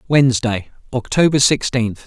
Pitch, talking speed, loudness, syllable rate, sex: 125 Hz, 85 wpm, -17 LUFS, 4.7 syllables/s, male